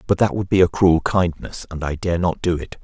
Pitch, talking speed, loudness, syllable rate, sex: 85 Hz, 275 wpm, -19 LUFS, 5.3 syllables/s, male